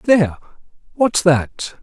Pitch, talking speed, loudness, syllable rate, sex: 165 Hz, 100 wpm, -17 LUFS, 3.7 syllables/s, male